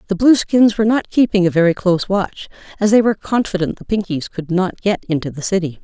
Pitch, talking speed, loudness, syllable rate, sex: 190 Hz, 215 wpm, -16 LUFS, 6.1 syllables/s, female